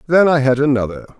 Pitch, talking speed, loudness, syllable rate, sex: 135 Hz, 200 wpm, -15 LUFS, 6.5 syllables/s, male